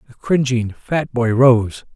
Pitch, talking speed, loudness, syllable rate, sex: 120 Hz, 155 wpm, -17 LUFS, 3.7 syllables/s, male